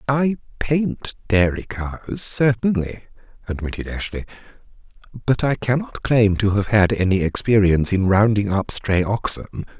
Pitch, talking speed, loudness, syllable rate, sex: 110 Hz, 130 wpm, -20 LUFS, 4.6 syllables/s, male